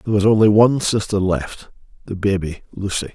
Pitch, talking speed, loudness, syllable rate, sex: 100 Hz, 170 wpm, -18 LUFS, 5.8 syllables/s, male